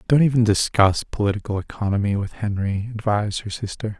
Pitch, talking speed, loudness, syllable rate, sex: 105 Hz, 150 wpm, -22 LUFS, 5.8 syllables/s, male